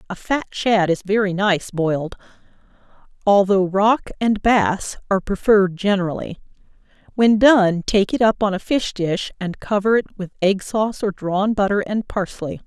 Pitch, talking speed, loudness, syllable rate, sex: 200 Hz, 160 wpm, -19 LUFS, 4.8 syllables/s, female